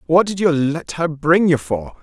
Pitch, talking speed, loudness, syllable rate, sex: 155 Hz, 235 wpm, -18 LUFS, 4.3 syllables/s, male